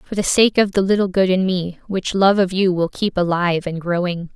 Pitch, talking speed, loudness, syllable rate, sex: 185 Hz, 250 wpm, -18 LUFS, 5.2 syllables/s, female